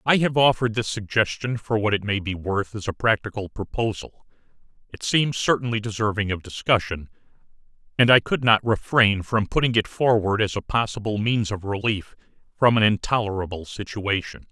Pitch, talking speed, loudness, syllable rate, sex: 110 Hz, 165 wpm, -22 LUFS, 5.3 syllables/s, male